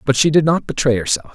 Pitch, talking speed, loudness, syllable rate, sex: 140 Hz, 265 wpm, -16 LUFS, 6.5 syllables/s, male